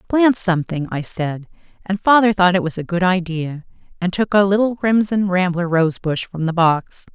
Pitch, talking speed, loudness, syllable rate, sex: 180 Hz, 195 wpm, -18 LUFS, 4.9 syllables/s, female